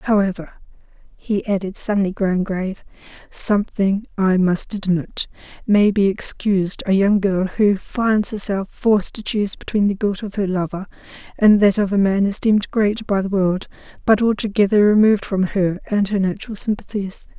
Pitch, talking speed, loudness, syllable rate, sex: 200 Hz, 160 wpm, -19 LUFS, 5.1 syllables/s, female